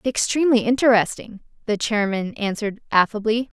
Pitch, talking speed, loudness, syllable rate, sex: 220 Hz, 115 wpm, -20 LUFS, 6.1 syllables/s, female